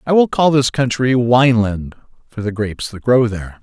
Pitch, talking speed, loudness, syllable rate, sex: 120 Hz, 200 wpm, -16 LUFS, 5.4 syllables/s, male